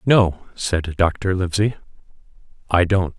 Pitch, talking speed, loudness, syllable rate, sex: 95 Hz, 115 wpm, -20 LUFS, 3.9 syllables/s, male